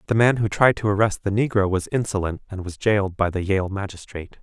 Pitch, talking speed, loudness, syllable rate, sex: 100 Hz, 230 wpm, -22 LUFS, 6.0 syllables/s, male